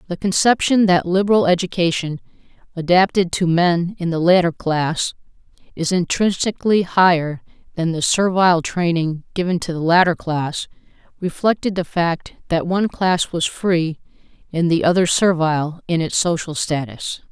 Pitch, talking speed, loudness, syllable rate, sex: 175 Hz, 140 wpm, -18 LUFS, 4.8 syllables/s, female